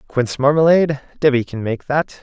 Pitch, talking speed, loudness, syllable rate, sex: 140 Hz, 160 wpm, -17 LUFS, 5.8 syllables/s, male